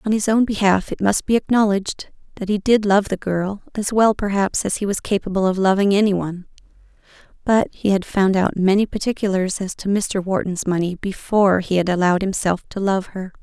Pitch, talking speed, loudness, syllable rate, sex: 195 Hz, 195 wpm, -19 LUFS, 5.6 syllables/s, female